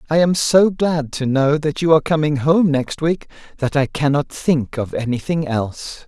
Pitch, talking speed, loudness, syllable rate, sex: 150 Hz, 205 wpm, -18 LUFS, 4.7 syllables/s, male